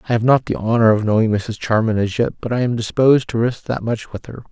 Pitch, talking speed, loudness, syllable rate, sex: 115 Hz, 280 wpm, -18 LUFS, 6.2 syllables/s, male